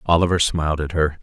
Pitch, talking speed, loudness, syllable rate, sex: 80 Hz, 195 wpm, -20 LUFS, 6.4 syllables/s, male